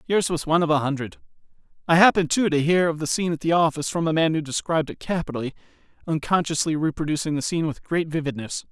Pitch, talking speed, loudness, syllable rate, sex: 160 Hz, 215 wpm, -23 LUFS, 7.1 syllables/s, male